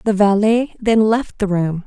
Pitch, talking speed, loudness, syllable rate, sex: 210 Hz, 195 wpm, -16 LUFS, 4.1 syllables/s, female